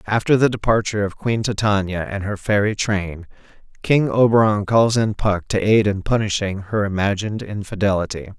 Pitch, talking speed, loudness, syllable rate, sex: 105 Hz, 155 wpm, -19 LUFS, 5.2 syllables/s, male